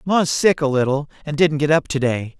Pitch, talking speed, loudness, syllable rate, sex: 145 Hz, 250 wpm, -19 LUFS, 5.1 syllables/s, male